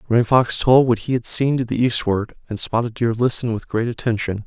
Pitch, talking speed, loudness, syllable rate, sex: 115 Hz, 230 wpm, -19 LUFS, 5.8 syllables/s, male